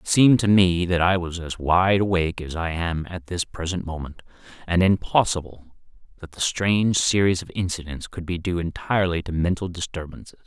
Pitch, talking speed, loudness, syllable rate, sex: 90 Hz, 185 wpm, -22 LUFS, 5.4 syllables/s, male